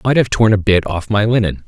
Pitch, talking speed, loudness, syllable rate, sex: 105 Hz, 325 wpm, -15 LUFS, 6.4 syllables/s, male